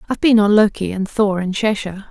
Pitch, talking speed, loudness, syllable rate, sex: 205 Hz, 230 wpm, -16 LUFS, 5.9 syllables/s, female